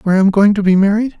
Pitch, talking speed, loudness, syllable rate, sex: 200 Hz, 350 wpm, -12 LUFS, 8.3 syllables/s, male